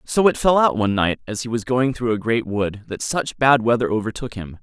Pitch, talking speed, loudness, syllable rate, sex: 120 Hz, 260 wpm, -20 LUFS, 5.4 syllables/s, male